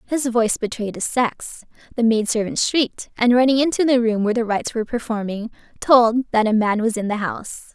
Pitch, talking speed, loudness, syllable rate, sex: 230 Hz, 210 wpm, -19 LUFS, 5.7 syllables/s, female